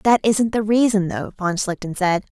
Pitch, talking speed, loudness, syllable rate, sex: 205 Hz, 200 wpm, -20 LUFS, 4.7 syllables/s, female